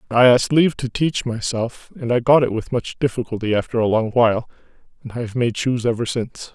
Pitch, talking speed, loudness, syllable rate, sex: 120 Hz, 220 wpm, -19 LUFS, 5.9 syllables/s, male